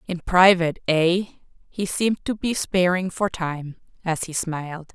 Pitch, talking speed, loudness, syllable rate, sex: 175 Hz, 145 wpm, -22 LUFS, 4.6 syllables/s, female